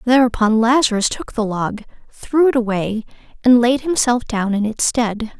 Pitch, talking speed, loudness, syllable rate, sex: 235 Hz, 165 wpm, -17 LUFS, 4.6 syllables/s, female